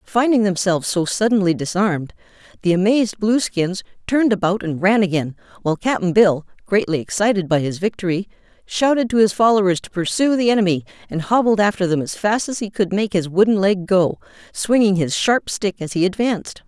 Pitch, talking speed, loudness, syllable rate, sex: 195 Hz, 180 wpm, -18 LUFS, 5.6 syllables/s, female